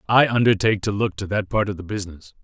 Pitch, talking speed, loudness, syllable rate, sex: 105 Hz, 245 wpm, -21 LUFS, 6.8 syllables/s, male